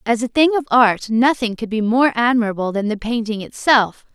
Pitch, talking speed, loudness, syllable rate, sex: 235 Hz, 205 wpm, -17 LUFS, 5.2 syllables/s, female